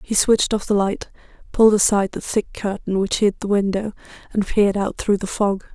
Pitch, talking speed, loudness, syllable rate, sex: 205 Hz, 210 wpm, -20 LUFS, 5.7 syllables/s, female